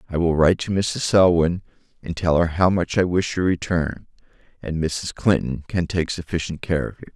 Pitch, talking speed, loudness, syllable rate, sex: 85 Hz, 200 wpm, -21 LUFS, 5.1 syllables/s, male